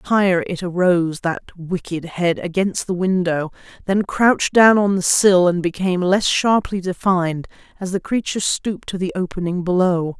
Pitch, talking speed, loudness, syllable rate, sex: 185 Hz, 155 wpm, -18 LUFS, 4.9 syllables/s, female